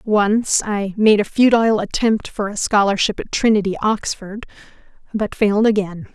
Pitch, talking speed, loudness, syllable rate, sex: 210 Hz, 135 wpm, -17 LUFS, 4.8 syllables/s, female